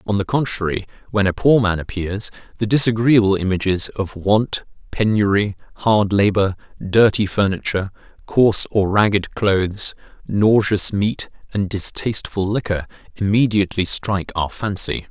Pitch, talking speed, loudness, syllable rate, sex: 100 Hz, 125 wpm, -18 LUFS, 4.8 syllables/s, male